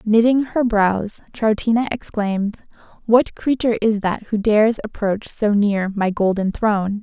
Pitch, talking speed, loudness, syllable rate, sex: 215 Hz, 145 wpm, -19 LUFS, 4.5 syllables/s, female